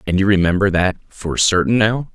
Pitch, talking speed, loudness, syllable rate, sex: 100 Hz, 195 wpm, -16 LUFS, 5.2 syllables/s, male